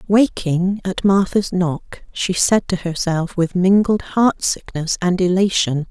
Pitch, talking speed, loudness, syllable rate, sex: 185 Hz, 140 wpm, -18 LUFS, 3.7 syllables/s, female